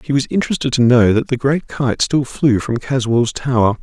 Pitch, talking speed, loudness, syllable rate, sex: 130 Hz, 220 wpm, -16 LUFS, 5.1 syllables/s, male